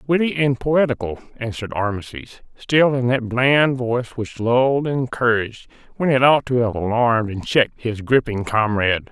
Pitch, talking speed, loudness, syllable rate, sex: 120 Hz, 165 wpm, -19 LUFS, 5.2 syllables/s, male